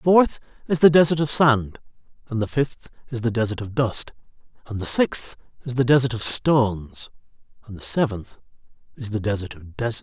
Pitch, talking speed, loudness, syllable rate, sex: 120 Hz, 185 wpm, -21 LUFS, 5.3 syllables/s, male